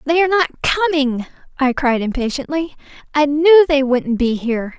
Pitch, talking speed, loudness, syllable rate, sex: 285 Hz, 165 wpm, -16 LUFS, 4.8 syllables/s, female